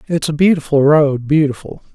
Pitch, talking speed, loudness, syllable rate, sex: 150 Hz, 155 wpm, -14 LUFS, 5.2 syllables/s, male